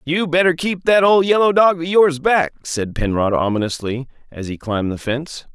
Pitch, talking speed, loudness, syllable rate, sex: 150 Hz, 195 wpm, -17 LUFS, 5.3 syllables/s, male